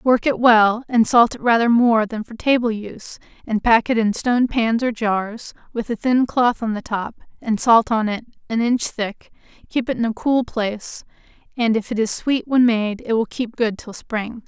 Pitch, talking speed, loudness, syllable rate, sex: 230 Hz, 220 wpm, -19 LUFS, 4.6 syllables/s, female